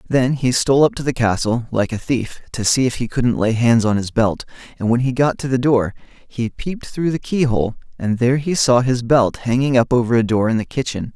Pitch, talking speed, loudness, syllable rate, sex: 125 Hz, 250 wpm, -18 LUFS, 5.4 syllables/s, male